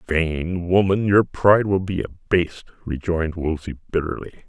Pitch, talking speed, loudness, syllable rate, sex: 85 Hz, 135 wpm, -21 LUFS, 5.2 syllables/s, male